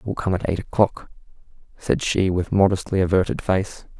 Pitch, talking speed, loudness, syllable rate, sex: 95 Hz, 180 wpm, -21 LUFS, 5.4 syllables/s, male